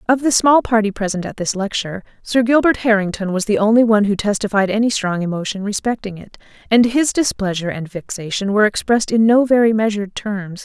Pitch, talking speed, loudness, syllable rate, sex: 210 Hz, 190 wpm, -17 LUFS, 6.1 syllables/s, female